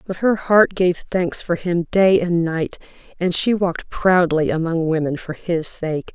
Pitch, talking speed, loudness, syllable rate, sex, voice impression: 170 Hz, 185 wpm, -19 LUFS, 4.1 syllables/s, female, very feminine, very adult-like, very middle-aged, very thin, slightly relaxed, weak, slightly bright, soft, very muffled, fluent, raspy, cute, slightly cool, very intellectual, refreshing, very sincere, very calm, very friendly, very reassuring, very unique, very elegant, slightly wild, very sweet, slightly lively, kind, modest, very light